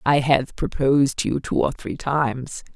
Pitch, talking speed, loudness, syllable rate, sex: 135 Hz, 195 wpm, -22 LUFS, 4.7 syllables/s, female